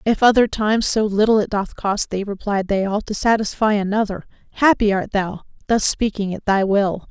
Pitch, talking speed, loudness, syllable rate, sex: 205 Hz, 195 wpm, -19 LUFS, 5.1 syllables/s, female